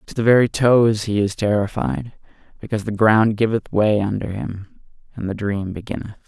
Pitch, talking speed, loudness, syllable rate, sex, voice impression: 105 Hz, 170 wpm, -19 LUFS, 5.1 syllables/s, male, masculine, middle-aged, weak, dark, muffled, halting, raspy, calm, slightly mature, slightly kind, modest